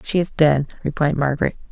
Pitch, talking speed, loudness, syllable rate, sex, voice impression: 150 Hz, 175 wpm, -20 LUFS, 6.1 syllables/s, female, very feminine, very adult-like, thin, tensed, powerful, bright, slightly soft, clear, fluent, slightly raspy, cool, very intellectual, refreshing, very sincere, very calm, very friendly, very reassuring, unique, very elegant, wild, very sweet, lively, kind, slightly intense, slightly light